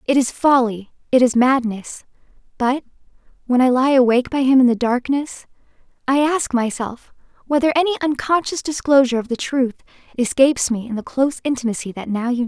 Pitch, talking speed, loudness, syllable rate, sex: 255 Hz, 175 wpm, -18 LUFS, 5.9 syllables/s, female